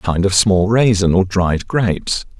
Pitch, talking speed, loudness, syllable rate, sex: 100 Hz, 200 wpm, -15 LUFS, 4.4 syllables/s, male